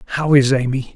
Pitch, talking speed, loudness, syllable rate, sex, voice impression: 135 Hz, 190 wpm, -16 LUFS, 6.6 syllables/s, male, masculine, slightly middle-aged, thick, tensed, bright, slightly soft, intellectual, slightly calm, mature, wild, lively, slightly intense